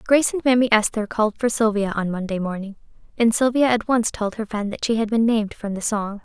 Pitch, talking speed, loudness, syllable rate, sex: 220 Hz, 240 wpm, -21 LUFS, 6.1 syllables/s, female